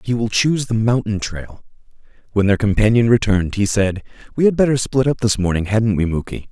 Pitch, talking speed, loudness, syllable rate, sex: 110 Hz, 205 wpm, -17 LUFS, 5.7 syllables/s, male